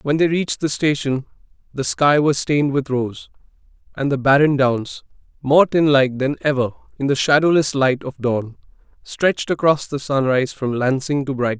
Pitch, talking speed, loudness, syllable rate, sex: 140 Hz, 170 wpm, -18 LUFS, 5.1 syllables/s, male